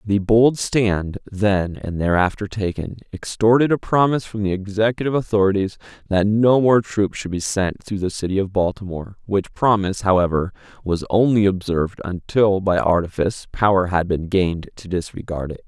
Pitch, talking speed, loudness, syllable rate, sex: 100 Hz, 160 wpm, -20 LUFS, 5.2 syllables/s, male